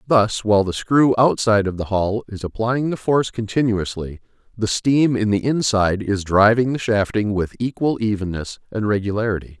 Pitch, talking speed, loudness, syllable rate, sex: 110 Hz, 170 wpm, -19 LUFS, 5.3 syllables/s, male